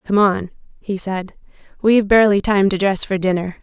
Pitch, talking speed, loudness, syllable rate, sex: 195 Hz, 180 wpm, -17 LUFS, 5.6 syllables/s, female